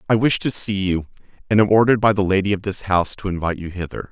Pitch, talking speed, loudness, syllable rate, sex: 100 Hz, 265 wpm, -19 LUFS, 7.1 syllables/s, male